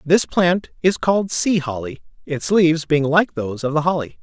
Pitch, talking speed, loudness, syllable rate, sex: 160 Hz, 200 wpm, -19 LUFS, 5.0 syllables/s, male